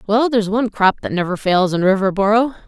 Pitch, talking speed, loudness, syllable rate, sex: 205 Hz, 200 wpm, -17 LUFS, 6.4 syllables/s, female